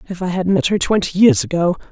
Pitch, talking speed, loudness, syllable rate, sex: 190 Hz, 250 wpm, -16 LUFS, 6.3 syllables/s, female